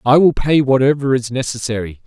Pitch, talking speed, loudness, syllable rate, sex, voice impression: 130 Hz, 175 wpm, -16 LUFS, 5.6 syllables/s, male, masculine, very adult-like, slightly thick, cool, slightly intellectual, slightly elegant